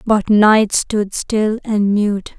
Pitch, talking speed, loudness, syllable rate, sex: 210 Hz, 150 wpm, -15 LUFS, 2.7 syllables/s, female